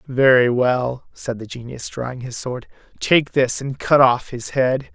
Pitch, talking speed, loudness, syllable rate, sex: 130 Hz, 180 wpm, -19 LUFS, 4.1 syllables/s, male